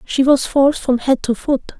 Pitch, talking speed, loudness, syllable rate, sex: 265 Hz, 235 wpm, -16 LUFS, 4.8 syllables/s, female